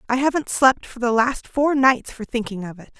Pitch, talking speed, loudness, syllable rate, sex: 245 Hz, 240 wpm, -20 LUFS, 5.1 syllables/s, female